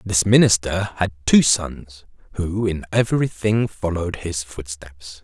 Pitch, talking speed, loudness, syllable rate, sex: 90 Hz, 140 wpm, -20 LUFS, 4.1 syllables/s, male